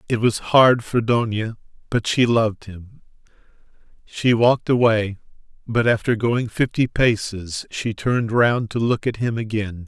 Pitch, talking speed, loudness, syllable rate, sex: 115 Hz, 150 wpm, -20 LUFS, 4.4 syllables/s, male